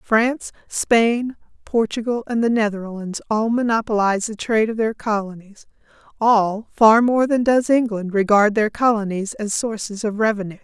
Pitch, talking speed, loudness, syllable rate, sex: 220 Hz, 145 wpm, -19 LUFS, 4.8 syllables/s, female